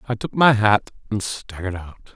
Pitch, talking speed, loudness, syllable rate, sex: 110 Hz, 195 wpm, -20 LUFS, 5.0 syllables/s, male